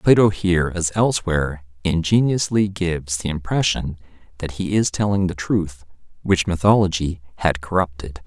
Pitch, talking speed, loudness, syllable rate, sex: 90 Hz, 130 wpm, -20 LUFS, 5.0 syllables/s, male